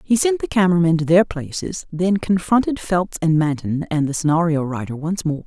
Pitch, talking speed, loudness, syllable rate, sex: 170 Hz, 210 wpm, -19 LUFS, 5.3 syllables/s, female